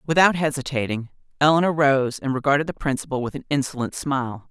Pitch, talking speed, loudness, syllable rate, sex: 140 Hz, 160 wpm, -22 LUFS, 6.2 syllables/s, female